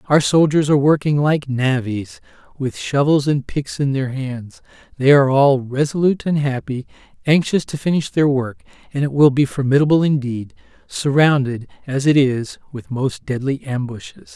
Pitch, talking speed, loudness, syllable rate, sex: 135 Hz, 160 wpm, -18 LUFS, 4.8 syllables/s, male